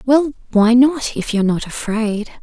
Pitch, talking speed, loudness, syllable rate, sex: 235 Hz, 175 wpm, -16 LUFS, 4.6 syllables/s, female